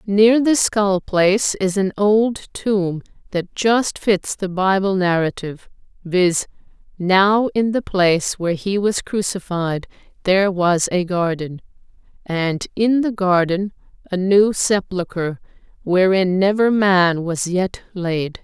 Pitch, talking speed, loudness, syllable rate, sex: 190 Hz, 130 wpm, -18 LUFS, 3.7 syllables/s, female